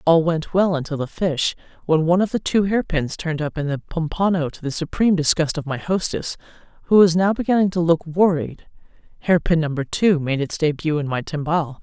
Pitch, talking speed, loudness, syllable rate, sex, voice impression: 165 Hz, 215 wpm, -20 LUFS, 5.7 syllables/s, female, slightly feminine, adult-like, slightly cool, intellectual, slightly calm, slightly sweet